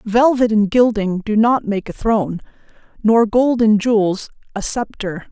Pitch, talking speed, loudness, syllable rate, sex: 215 Hz, 160 wpm, -17 LUFS, 4.4 syllables/s, female